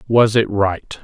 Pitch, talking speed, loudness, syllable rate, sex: 105 Hz, 175 wpm, -16 LUFS, 3.5 syllables/s, male